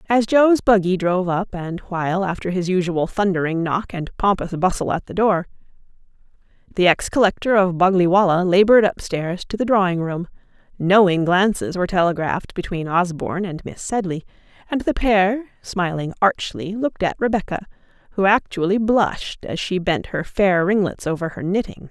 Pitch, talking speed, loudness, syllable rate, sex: 185 Hz, 165 wpm, -19 LUFS, 5.3 syllables/s, female